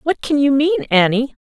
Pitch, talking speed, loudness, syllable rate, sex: 275 Hz, 210 wpm, -16 LUFS, 4.7 syllables/s, female